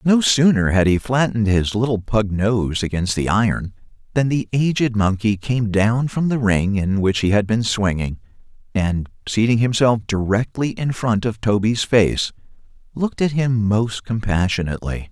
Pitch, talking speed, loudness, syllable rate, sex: 110 Hz, 165 wpm, -19 LUFS, 4.6 syllables/s, male